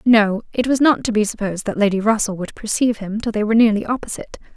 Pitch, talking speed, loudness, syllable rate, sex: 215 Hz, 235 wpm, -18 LUFS, 6.9 syllables/s, female